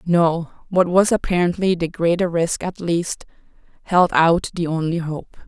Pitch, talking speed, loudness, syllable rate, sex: 170 Hz, 155 wpm, -19 LUFS, 4.4 syllables/s, female